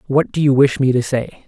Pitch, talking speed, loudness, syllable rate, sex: 135 Hz, 285 wpm, -16 LUFS, 5.4 syllables/s, male